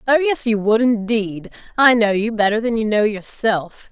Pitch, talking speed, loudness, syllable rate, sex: 220 Hz, 200 wpm, -17 LUFS, 4.6 syllables/s, female